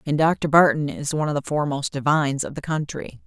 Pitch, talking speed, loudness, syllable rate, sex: 150 Hz, 220 wpm, -22 LUFS, 6.1 syllables/s, female